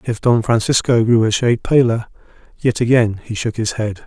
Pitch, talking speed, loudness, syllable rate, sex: 115 Hz, 190 wpm, -16 LUFS, 5.3 syllables/s, male